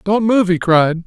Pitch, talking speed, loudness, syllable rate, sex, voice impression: 185 Hz, 225 wpm, -14 LUFS, 4.1 syllables/s, male, masculine, adult-like, tensed, slightly friendly, slightly unique